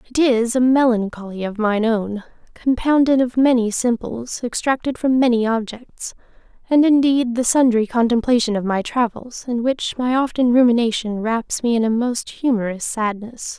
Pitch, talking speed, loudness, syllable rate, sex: 240 Hz, 155 wpm, -18 LUFS, 4.7 syllables/s, female